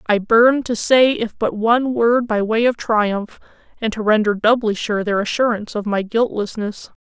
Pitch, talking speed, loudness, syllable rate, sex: 220 Hz, 190 wpm, -18 LUFS, 4.8 syllables/s, female